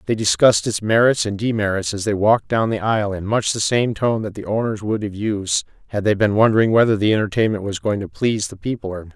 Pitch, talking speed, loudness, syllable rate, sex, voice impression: 105 Hz, 250 wpm, -19 LUFS, 6.2 syllables/s, male, very masculine, very middle-aged, very thick, tensed, powerful, slightly dark, slightly hard, slightly muffled, fluent, raspy, cool, slightly intellectual, slightly refreshing, sincere, calm, very mature, friendly, reassuring, unique, slightly elegant, wild, slightly sweet, slightly lively, strict